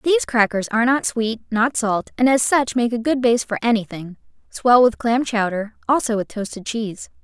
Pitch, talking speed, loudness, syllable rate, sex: 235 Hz, 190 wpm, -19 LUFS, 5.1 syllables/s, female